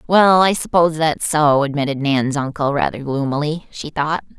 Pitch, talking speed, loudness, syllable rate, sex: 150 Hz, 165 wpm, -17 LUFS, 4.7 syllables/s, female